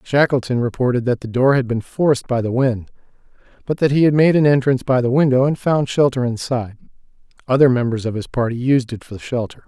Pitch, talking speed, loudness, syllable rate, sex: 130 Hz, 205 wpm, -17 LUFS, 6.1 syllables/s, male